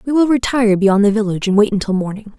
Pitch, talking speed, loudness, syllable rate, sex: 215 Hz, 250 wpm, -15 LUFS, 7.1 syllables/s, female